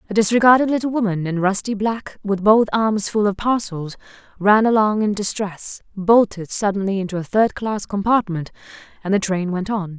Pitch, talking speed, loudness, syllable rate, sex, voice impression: 205 Hz, 175 wpm, -19 LUFS, 5.1 syllables/s, female, feminine, adult-like, fluent, slightly cute, slightly refreshing, friendly, sweet